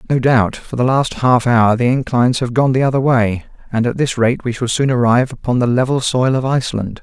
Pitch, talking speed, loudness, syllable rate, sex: 125 Hz, 240 wpm, -15 LUFS, 5.6 syllables/s, male